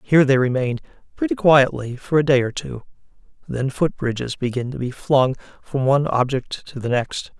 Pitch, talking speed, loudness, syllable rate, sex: 135 Hz, 185 wpm, -20 LUFS, 5.2 syllables/s, male